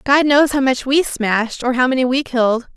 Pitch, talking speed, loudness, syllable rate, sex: 260 Hz, 240 wpm, -16 LUFS, 5.3 syllables/s, female